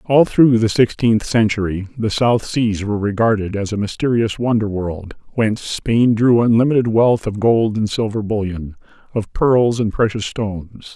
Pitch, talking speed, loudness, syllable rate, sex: 110 Hz, 160 wpm, -17 LUFS, 4.7 syllables/s, male